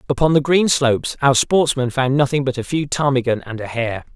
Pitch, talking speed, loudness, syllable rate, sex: 135 Hz, 215 wpm, -18 LUFS, 5.5 syllables/s, male